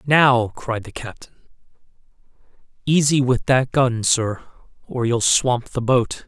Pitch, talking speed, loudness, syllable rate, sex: 125 Hz, 135 wpm, -19 LUFS, 3.8 syllables/s, male